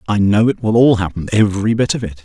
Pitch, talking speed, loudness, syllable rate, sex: 105 Hz, 270 wpm, -15 LUFS, 6.4 syllables/s, male